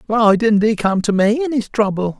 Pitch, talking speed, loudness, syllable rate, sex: 215 Hz, 245 wpm, -16 LUFS, 4.9 syllables/s, male